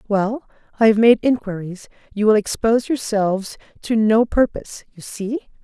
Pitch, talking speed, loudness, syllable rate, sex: 215 Hz, 150 wpm, -18 LUFS, 5.0 syllables/s, female